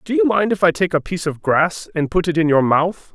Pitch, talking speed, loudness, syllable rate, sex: 170 Hz, 305 wpm, -18 LUFS, 5.7 syllables/s, male